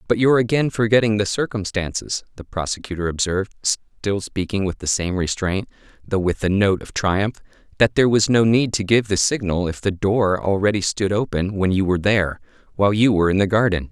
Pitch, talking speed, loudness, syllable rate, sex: 100 Hz, 200 wpm, -20 LUFS, 5.7 syllables/s, male